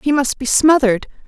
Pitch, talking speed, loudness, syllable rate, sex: 265 Hz, 190 wpm, -15 LUFS, 5.6 syllables/s, female